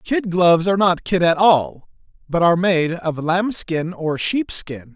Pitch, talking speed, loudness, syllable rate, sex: 175 Hz, 170 wpm, -18 LUFS, 4.3 syllables/s, male